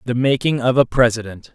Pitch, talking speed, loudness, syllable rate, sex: 125 Hz, 195 wpm, -17 LUFS, 5.8 syllables/s, male